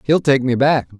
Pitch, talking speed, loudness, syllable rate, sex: 130 Hz, 240 wpm, -16 LUFS, 4.9 syllables/s, male